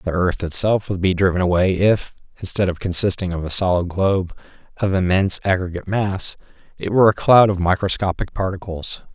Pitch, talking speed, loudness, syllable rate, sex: 95 Hz, 170 wpm, -19 LUFS, 5.6 syllables/s, male